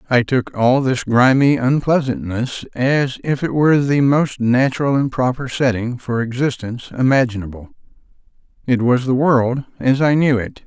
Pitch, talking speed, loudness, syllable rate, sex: 130 Hz, 150 wpm, -17 LUFS, 4.8 syllables/s, male